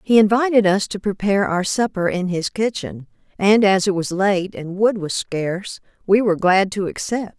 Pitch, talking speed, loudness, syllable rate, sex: 195 Hz, 195 wpm, -19 LUFS, 4.9 syllables/s, female